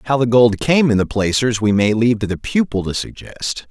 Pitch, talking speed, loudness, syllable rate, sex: 115 Hz, 225 wpm, -16 LUFS, 5.1 syllables/s, male